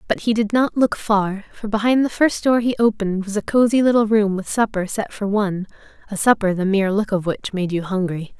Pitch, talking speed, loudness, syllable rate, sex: 210 Hz, 235 wpm, -19 LUFS, 5.6 syllables/s, female